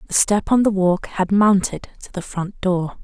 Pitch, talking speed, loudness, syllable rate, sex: 190 Hz, 215 wpm, -19 LUFS, 4.5 syllables/s, female